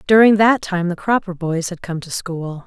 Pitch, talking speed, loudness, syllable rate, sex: 185 Hz, 225 wpm, -18 LUFS, 4.7 syllables/s, female